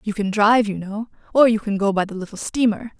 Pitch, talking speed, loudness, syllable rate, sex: 210 Hz, 260 wpm, -20 LUFS, 6.2 syllables/s, female